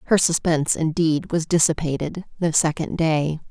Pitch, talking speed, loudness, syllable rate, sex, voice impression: 160 Hz, 135 wpm, -21 LUFS, 4.9 syllables/s, female, feminine, young, slightly cute, slightly intellectual, sincere, slightly reassuring, slightly elegant, slightly kind